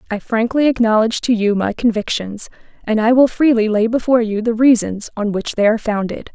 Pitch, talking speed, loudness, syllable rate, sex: 225 Hz, 200 wpm, -16 LUFS, 5.8 syllables/s, female